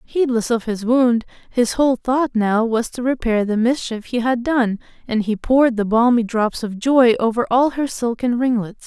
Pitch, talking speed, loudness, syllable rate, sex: 240 Hz, 195 wpm, -18 LUFS, 4.7 syllables/s, female